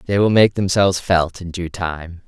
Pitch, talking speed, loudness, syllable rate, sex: 90 Hz, 210 wpm, -18 LUFS, 4.5 syllables/s, male